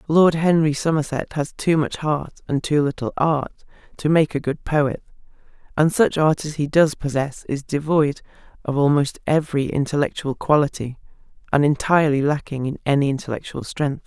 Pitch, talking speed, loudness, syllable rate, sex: 145 Hz, 160 wpm, -21 LUFS, 5.2 syllables/s, female